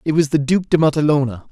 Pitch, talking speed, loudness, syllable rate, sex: 150 Hz, 240 wpm, -17 LUFS, 6.7 syllables/s, male